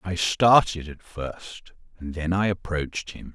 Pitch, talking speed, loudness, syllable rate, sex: 85 Hz, 160 wpm, -24 LUFS, 4.0 syllables/s, male